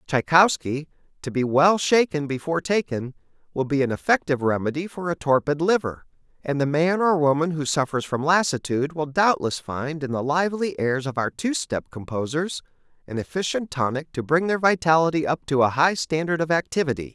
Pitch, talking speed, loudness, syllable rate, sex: 150 Hz, 180 wpm, -23 LUFS, 5.4 syllables/s, male